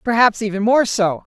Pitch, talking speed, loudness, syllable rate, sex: 215 Hz, 175 wpm, -17 LUFS, 5.1 syllables/s, female